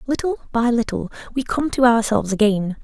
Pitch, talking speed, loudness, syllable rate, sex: 235 Hz, 170 wpm, -20 LUFS, 5.8 syllables/s, female